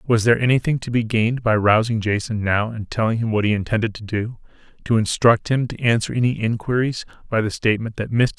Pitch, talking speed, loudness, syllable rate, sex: 115 Hz, 205 wpm, -20 LUFS, 6.0 syllables/s, male